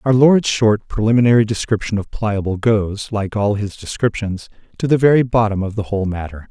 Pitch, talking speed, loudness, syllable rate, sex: 110 Hz, 185 wpm, -17 LUFS, 5.4 syllables/s, male